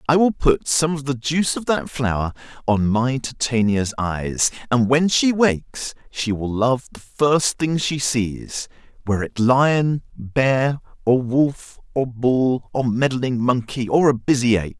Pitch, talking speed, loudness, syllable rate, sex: 130 Hz, 165 wpm, -20 LUFS, 4.0 syllables/s, male